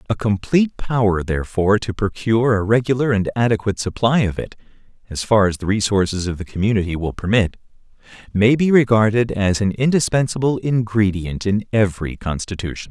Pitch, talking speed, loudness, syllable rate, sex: 105 Hz, 155 wpm, -18 LUFS, 5.8 syllables/s, male